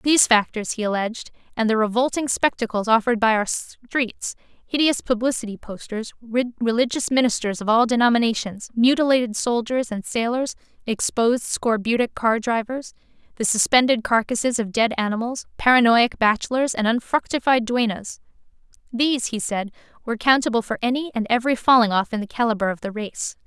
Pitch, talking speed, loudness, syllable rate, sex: 235 Hz, 135 wpm, -21 LUFS, 5.6 syllables/s, female